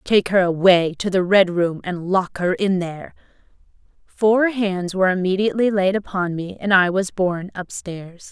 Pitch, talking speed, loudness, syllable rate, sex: 185 Hz, 175 wpm, -19 LUFS, 4.7 syllables/s, female